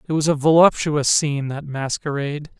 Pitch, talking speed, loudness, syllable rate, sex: 145 Hz, 160 wpm, -19 LUFS, 5.5 syllables/s, male